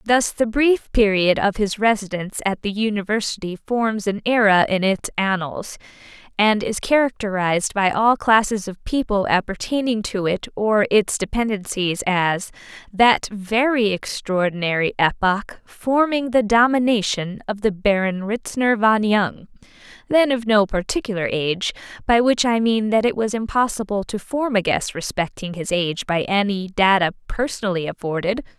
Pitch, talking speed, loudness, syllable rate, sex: 210 Hz, 145 wpm, -20 LUFS, 4.7 syllables/s, female